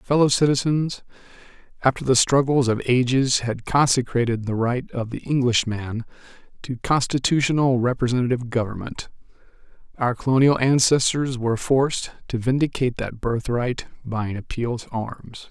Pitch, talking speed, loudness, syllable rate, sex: 125 Hz, 125 wpm, -22 LUFS, 5.1 syllables/s, male